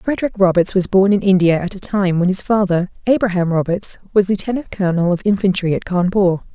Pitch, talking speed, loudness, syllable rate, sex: 190 Hz, 195 wpm, -16 LUFS, 6.1 syllables/s, female